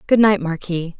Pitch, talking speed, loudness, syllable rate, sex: 185 Hz, 180 wpm, -18 LUFS, 4.7 syllables/s, female